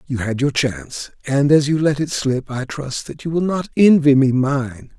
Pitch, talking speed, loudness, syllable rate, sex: 140 Hz, 230 wpm, -18 LUFS, 4.6 syllables/s, male